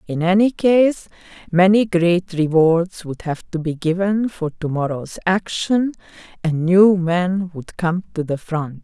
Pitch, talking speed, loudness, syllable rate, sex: 175 Hz, 150 wpm, -18 LUFS, 3.8 syllables/s, female